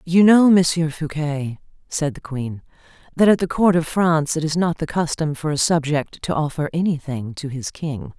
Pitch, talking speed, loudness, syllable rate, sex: 155 Hz, 200 wpm, -20 LUFS, 4.8 syllables/s, female